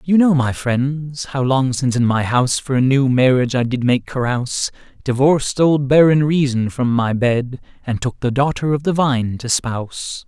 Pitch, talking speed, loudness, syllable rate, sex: 130 Hz, 200 wpm, -17 LUFS, 4.9 syllables/s, male